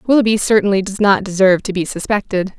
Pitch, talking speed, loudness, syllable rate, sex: 200 Hz, 185 wpm, -15 LUFS, 6.3 syllables/s, female